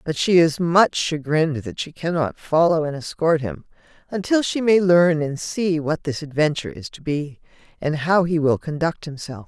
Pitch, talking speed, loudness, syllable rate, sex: 160 Hz, 190 wpm, -20 LUFS, 4.8 syllables/s, female